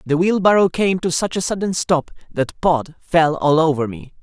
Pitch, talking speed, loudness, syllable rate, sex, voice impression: 165 Hz, 200 wpm, -18 LUFS, 4.7 syllables/s, male, very feminine, very adult-like, slightly thick, slightly tensed, slightly powerful, slightly dark, soft, clear, fluent, slightly raspy, cool, very intellectual, very refreshing, sincere, calm, slightly mature, very friendly, very reassuring, very unique, very elegant, wild, slightly sweet, lively, slightly strict, slightly intense